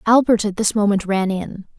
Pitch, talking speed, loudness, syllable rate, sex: 210 Hz, 200 wpm, -18 LUFS, 5.1 syllables/s, female